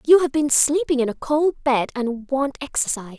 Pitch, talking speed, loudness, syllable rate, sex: 275 Hz, 205 wpm, -20 LUFS, 5.0 syllables/s, female